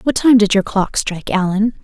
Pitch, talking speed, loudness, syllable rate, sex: 210 Hz, 230 wpm, -15 LUFS, 5.4 syllables/s, female